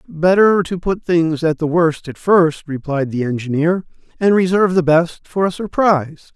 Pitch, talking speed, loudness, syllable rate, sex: 170 Hz, 180 wpm, -16 LUFS, 4.7 syllables/s, male